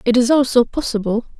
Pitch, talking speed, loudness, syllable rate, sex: 240 Hz, 170 wpm, -17 LUFS, 5.9 syllables/s, female